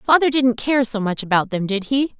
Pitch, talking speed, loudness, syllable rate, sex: 235 Hz, 245 wpm, -19 LUFS, 5.1 syllables/s, female